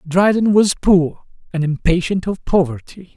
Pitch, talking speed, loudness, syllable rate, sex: 180 Hz, 135 wpm, -17 LUFS, 4.4 syllables/s, male